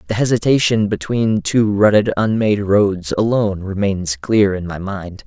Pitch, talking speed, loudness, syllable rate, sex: 100 Hz, 150 wpm, -16 LUFS, 4.6 syllables/s, male